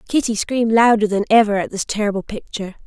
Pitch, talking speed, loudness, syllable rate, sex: 215 Hz, 190 wpm, -17 LUFS, 6.6 syllables/s, female